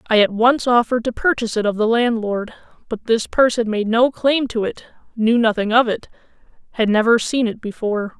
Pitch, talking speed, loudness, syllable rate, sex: 230 Hz, 185 wpm, -18 LUFS, 5.5 syllables/s, female